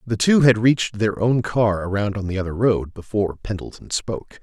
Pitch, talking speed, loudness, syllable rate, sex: 110 Hz, 205 wpm, -20 LUFS, 5.3 syllables/s, male